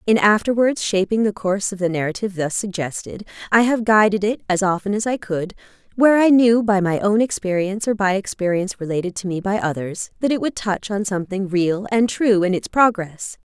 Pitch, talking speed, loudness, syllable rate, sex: 200 Hz, 205 wpm, -19 LUFS, 5.6 syllables/s, female